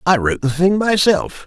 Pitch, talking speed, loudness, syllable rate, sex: 170 Hz, 205 wpm, -16 LUFS, 5.2 syllables/s, male